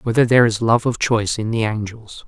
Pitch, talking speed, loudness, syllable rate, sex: 115 Hz, 235 wpm, -18 LUFS, 6.0 syllables/s, male